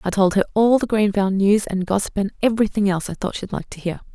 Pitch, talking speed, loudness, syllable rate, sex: 200 Hz, 260 wpm, -20 LUFS, 6.9 syllables/s, female